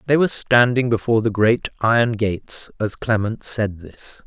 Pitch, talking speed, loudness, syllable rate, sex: 110 Hz, 170 wpm, -19 LUFS, 4.9 syllables/s, male